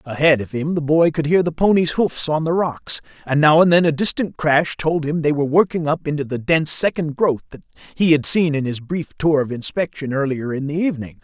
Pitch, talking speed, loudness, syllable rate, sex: 155 Hz, 240 wpm, -18 LUFS, 5.5 syllables/s, male